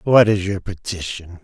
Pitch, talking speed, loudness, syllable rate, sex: 95 Hz, 170 wpm, -20 LUFS, 4.5 syllables/s, male